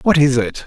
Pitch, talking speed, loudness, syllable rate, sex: 140 Hz, 270 wpm, -15 LUFS, 5.3 syllables/s, male